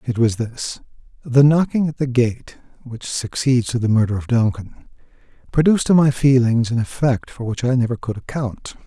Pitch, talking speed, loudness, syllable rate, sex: 125 Hz, 185 wpm, -18 LUFS, 5.1 syllables/s, male